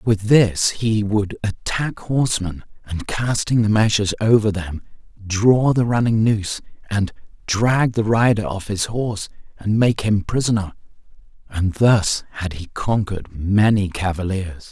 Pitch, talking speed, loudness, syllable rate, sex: 105 Hz, 140 wpm, -19 LUFS, 4.2 syllables/s, male